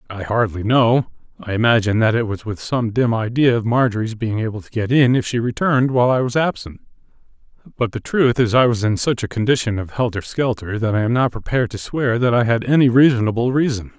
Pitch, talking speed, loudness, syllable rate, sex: 115 Hz, 215 wpm, -18 LUFS, 6.0 syllables/s, male